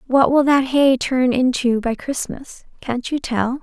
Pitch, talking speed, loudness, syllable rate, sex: 260 Hz, 180 wpm, -18 LUFS, 4.0 syllables/s, female